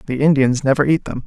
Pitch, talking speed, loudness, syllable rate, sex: 140 Hz, 240 wpm, -16 LUFS, 6.3 syllables/s, male